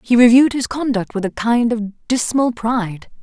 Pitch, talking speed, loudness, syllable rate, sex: 235 Hz, 185 wpm, -17 LUFS, 5.0 syllables/s, female